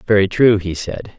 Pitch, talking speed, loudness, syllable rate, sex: 100 Hz, 205 wpm, -16 LUFS, 4.9 syllables/s, male